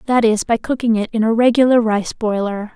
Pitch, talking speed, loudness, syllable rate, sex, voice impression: 225 Hz, 220 wpm, -16 LUFS, 5.4 syllables/s, female, feminine, slightly young, slightly weak, bright, soft, slightly halting, cute, friendly, reassuring, slightly sweet, kind, modest